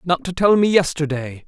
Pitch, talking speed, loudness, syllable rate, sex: 165 Hz, 205 wpm, -18 LUFS, 5.1 syllables/s, male